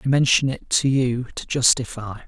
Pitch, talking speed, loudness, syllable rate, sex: 125 Hz, 185 wpm, -20 LUFS, 4.9 syllables/s, male